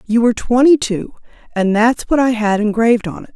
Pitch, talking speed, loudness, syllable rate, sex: 230 Hz, 215 wpm, -15 LUFS, 5.7 syllables/s, female